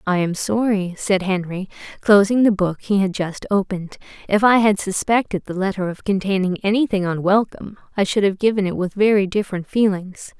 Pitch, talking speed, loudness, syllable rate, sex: 195 Hz, 180 wpm, -19 LUFS, 5.4 syllables/s, female